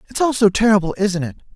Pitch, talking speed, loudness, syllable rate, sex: 205 Hz, 230 wpm, -17 LUFS, 6.7 syllables/s, male